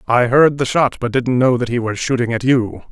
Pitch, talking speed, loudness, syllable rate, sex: 125 Hz, 270 wpm, -16 LUFS, 5.2 syllables/s, male